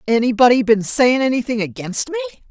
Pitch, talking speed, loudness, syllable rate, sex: 250 Hz, 145 wpm, -17 LUFS, 5.9 syllables/s, female